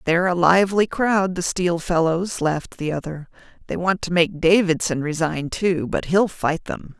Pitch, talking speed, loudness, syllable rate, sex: 175 Hz, 180 wpm, -20 LUFS, 4.7 syllables/s, female